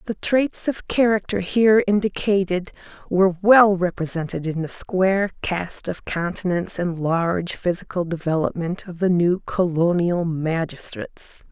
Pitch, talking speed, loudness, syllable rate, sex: 185 Hz, 125 wpm, -21 LUFS, 4.6 syllables/s, female